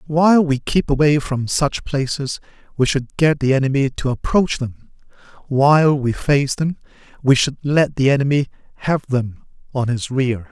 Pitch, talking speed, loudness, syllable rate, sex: 140 Hz, 165 wpm, -18 LUFS, 4.6 syllables/s, male